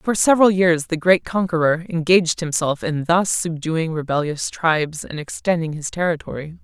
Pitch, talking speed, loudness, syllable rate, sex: 165 Hz, 155 wpm, -19 LUFS, 5.1 syllables/s, female